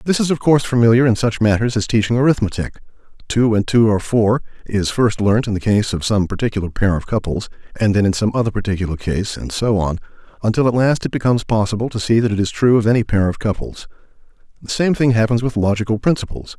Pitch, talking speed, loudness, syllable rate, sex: 110 Hz, 225 wpm, -17 LUFS, 6.4 syllables/s, male